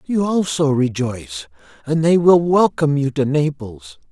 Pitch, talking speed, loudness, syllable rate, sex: 145 Hz, 130 wpm, -17 LUFS, 4.6 syllables/s, male